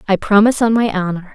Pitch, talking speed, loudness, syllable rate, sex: 205 Hz, 225 wpm, -14 LUFS, 6.7 syllables/s, female